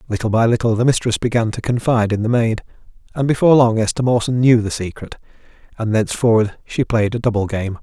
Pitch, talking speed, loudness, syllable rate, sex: 115 Hz, 190 wpm, -17 LUFS, 6.4 syllables/s, male